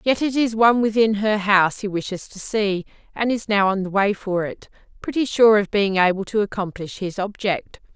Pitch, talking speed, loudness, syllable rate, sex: 205 Hz, 210 wpm, -20 LUFS, 5.2 syllables/s, female